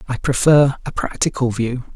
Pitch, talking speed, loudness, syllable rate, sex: 130 Hz, 155 wpm, -18 LUFS, 4.7 syllables/s, male